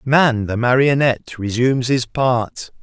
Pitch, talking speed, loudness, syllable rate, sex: 125 Hz, 130 wpm, -17 LUFS, 4.2 syllables/s, male